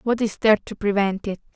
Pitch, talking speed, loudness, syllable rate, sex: 210 Hz, 230 wpm, -22 LUFS, 6.5 syllables/s, female